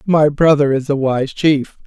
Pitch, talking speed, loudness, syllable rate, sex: 145 Hz, 195 wpm, -15 LUFS, 4.1 syllables/s, female